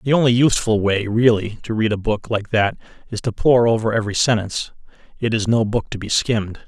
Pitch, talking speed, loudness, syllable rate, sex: 110 Hz, 215 wpm, -19 LUFS, 5.9 syllables/s, male